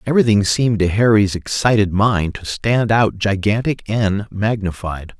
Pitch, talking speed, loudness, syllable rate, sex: 105 Hz, 140 wpm, -17 LUFS, 4.6 syllables/s, male